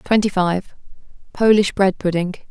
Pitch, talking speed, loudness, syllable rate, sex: 195 Hz, 95 wpm, -18 LUFS, 4.5 syllables/s, female